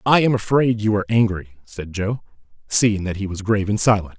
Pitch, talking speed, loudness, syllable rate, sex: 105 Hz, 215 wpm, -19 LUFS, 5.9 syllables/s, male